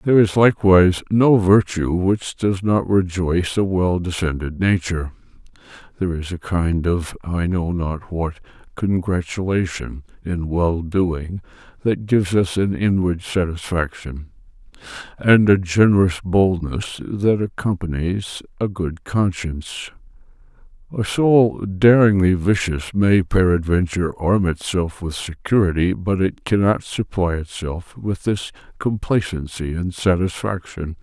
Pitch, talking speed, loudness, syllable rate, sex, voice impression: 90 Hz, 120 wpm, -19 LUFS, 4.2 syllables/s, male, masculine, middle-aged, thick, weak, muffled, slightly halting, sincere, calm, mature, slightly friendly, slightly wild, kind, modest